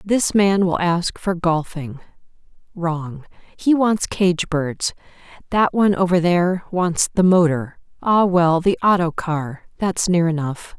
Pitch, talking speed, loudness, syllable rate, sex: 175 Hz, 135 wpm, -19 LUFS, 3.8 syllables/s, female